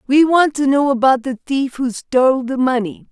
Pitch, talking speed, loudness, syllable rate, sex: 265 Hz, 210 wpm, -16 LUFS, 4.9 syllables/s, female